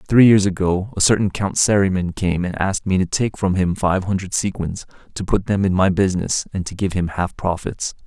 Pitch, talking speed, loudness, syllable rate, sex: 95 Hz, 225 wpm, -19 LUFS, 5.4 syllables/s, male